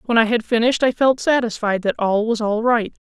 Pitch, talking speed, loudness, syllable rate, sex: 230 Hz, 235 wpm, -18 LUFS, 5.7 syllables/s, female